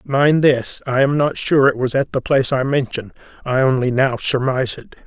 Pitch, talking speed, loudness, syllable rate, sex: 135 Hz, 215 wpm, -17 LUFS, 5.1 syllables/s, male